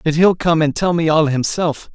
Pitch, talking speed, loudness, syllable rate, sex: 160 Hz, 245 wpm, -16 LUFS, 4.9 syllables/s, male